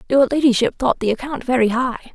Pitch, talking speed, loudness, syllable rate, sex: 250 Hz, 195 wpm, -18 LUFS, 6.0 syllables/s, female